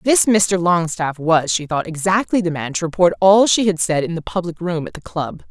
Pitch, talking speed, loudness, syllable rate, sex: 175 Hz, 240 wpm, -17 LUFS, 5.1 syllables/s, female